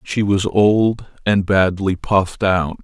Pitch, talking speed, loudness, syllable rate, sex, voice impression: 95 Hz, 150 wpm, -17 LUFS, 3.5 syllables/s, male, very masculine, slightly old, very thick, relaxed, very powerful, dark, slightly hard, muffled, slightly halting, raspy, very cool, intellectual, slightly sincere, very calm, very mature, very friendly, reassuring, very unique, elegant, very wild, very sweet, slightly lively, very kind, modest